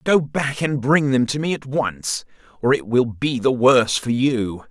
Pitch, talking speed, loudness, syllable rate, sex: 130 Hz, 215 wpm, -20 LUFS, 4.3 syllables/s, male